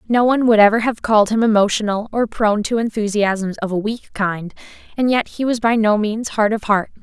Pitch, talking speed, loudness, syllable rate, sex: 215 Hz, 220 wpm, -17 LUFS, 5.6 syllables/s, female